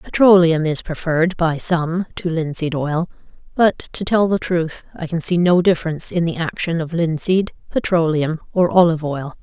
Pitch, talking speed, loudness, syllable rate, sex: 170 Hz, 170 wpm, -18 LUFS, 4.9 syllables/s, female